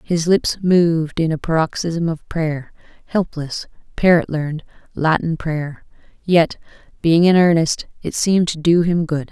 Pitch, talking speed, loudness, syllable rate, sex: 165 Hz, 140 wpm, -18 LUFS, 4.2 syllables/s, female